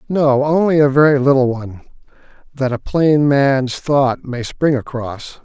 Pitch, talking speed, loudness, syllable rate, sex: 135 Hz, 155 wpm, -15 LUFS, 4.2 syllables/s, male